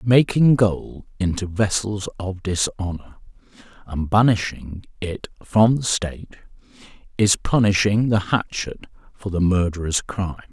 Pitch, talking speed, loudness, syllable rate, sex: 100 Hz, 115 wpm, -21 LUFS, 4.2 syllables/s, male